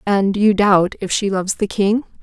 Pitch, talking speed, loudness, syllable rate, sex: 200 Hz, 215 wpm, -17 LUFS, 4.8 syllables/s, female